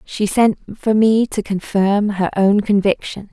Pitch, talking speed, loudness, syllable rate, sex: 205 Hz, 165 wpm, -17 LUFS, 3.8 syllables/s, female